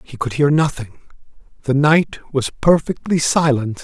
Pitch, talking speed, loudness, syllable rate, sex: 140 Hz, 140 wpm, -17 LUFS, 4.3 syllables/s, male